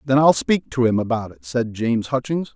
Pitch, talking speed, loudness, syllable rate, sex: 125 Hz, 235 wpm, -20 LUFS, 5.3 syllables/s, male